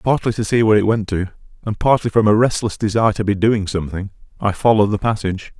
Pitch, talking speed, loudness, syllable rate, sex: 105 Hz, 225 wpm, -17 LUFS, 6.7 syllables/s, male